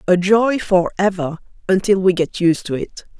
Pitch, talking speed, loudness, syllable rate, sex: 185 Hz, 170 wpm, -17 LUFS, 4.6 syllables/s, female